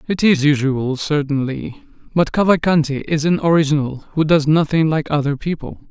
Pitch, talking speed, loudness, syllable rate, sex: 150 Hz, 150 wpm, -17 LUFS, 5.1 syllables/s, male